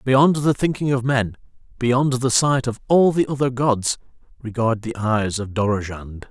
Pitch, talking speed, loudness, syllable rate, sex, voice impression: 120 Hz, 170 wpm, -20 LUFS, 4.4 syllables/s, male, masculine, adult-like, slightly cool, slightly refreshing, sincere, slightly elegant